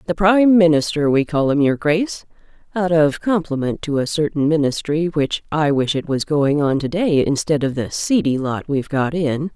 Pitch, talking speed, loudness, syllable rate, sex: 155 Hz, 195 wpm, -18 LUFS, 5.0 syllables/s, female